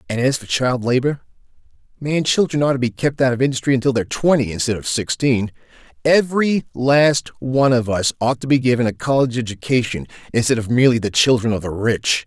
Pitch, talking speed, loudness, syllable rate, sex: 125 Hz, 190 wpm, -18 LUFS, 6.0 syllables/s, male